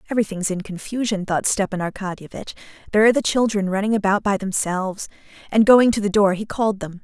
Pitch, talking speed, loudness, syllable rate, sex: 200 Hz, 190 wpm, -20 LUFS, 6.5 syllables/s, female